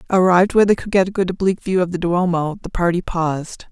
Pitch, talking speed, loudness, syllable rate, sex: 180 Hz, 240 wpm, -18 LUFS, 6.6 syllables/s, female